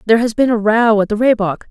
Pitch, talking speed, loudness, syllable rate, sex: 220 Hz, 280 wpm, -14 LUFS, 6.5 syllables/s, female